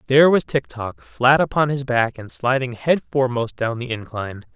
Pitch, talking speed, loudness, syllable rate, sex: 125 Hz, 185 wpm, -20 LUFS, 5.2 syllables/s, male